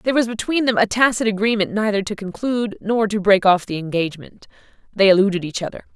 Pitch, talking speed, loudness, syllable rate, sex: 210 Hz, 200 wpm, -19 LUFS, 6.3 syllables/s, female